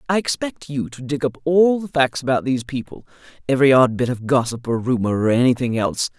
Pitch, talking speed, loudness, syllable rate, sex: 135 Hz, 215 wpm, -19 LUFS, 6.0 syllables/s, female